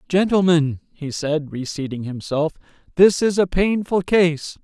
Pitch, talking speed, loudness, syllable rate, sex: 165 Hz, 130 wpm, -20 LUFS, 4.1 syllables/s, male